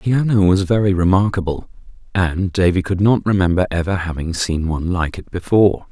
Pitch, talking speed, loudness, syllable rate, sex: 90 Hz, 175 wpm, -17 LUFS, 5.6 syllables/s, male